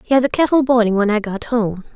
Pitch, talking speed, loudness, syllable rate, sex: 230 Hz, 275 wpm, -17 LUFS, 6.2 syllables/s, female